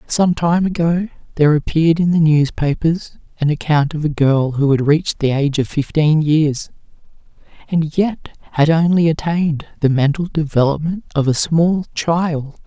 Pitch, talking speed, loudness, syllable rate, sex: 155 Hz, 155 wpm, -16 LUFS, 4.8 syllables/s, male